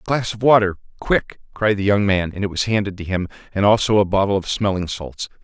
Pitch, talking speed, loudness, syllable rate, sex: 100 Hz, 245 wpm, -19 LUFS, 5.8 syllables/s, male